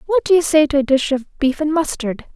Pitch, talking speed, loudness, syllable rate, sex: 295 Hz, 280 wpm, -17 LUFS, 5.9 syllables/s, female